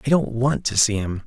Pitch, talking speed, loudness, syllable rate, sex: 120 Hz, 285 wpm, -21 LUFS, 5.4 syllables/s, male